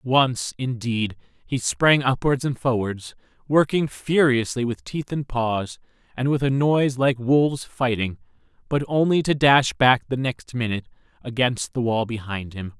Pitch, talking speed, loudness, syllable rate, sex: 125 Hz, 155 wpm, -22 LUFS, 4.3 syllables/s, male